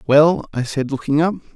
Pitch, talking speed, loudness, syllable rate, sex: 150 Hz, 195 wpm, -18 LUFS, 5.0 syllables/s, male